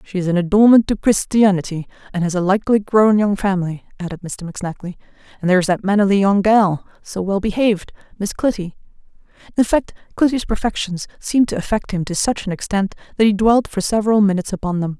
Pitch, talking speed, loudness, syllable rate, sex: 200 Hz, 180 wpm, -18 LUFS, 6.5 syllables/s, female